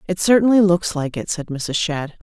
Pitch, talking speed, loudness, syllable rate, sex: 175 Hz, 210 wpm, -18 LUFS, 4.8 syllables/s, female